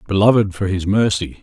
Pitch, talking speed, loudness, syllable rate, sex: 100 Hz, 170 wpm, -17 LUFS, 5.5 syllables/s, male